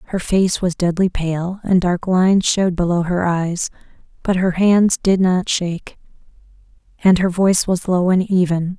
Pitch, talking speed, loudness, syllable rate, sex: 180 Hz, 170 wpm, -17 LUFS, 4.6 syllables/s, female